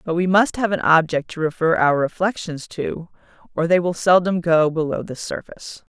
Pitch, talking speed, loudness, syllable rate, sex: 170 Hz, 190 wpm, -19 LUFS, 5.1 syllables/s, female